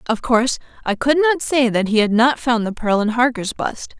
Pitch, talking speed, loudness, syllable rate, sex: 240 Hz, 240 wpm, -18 LUFS, 5.0 syllables/s, female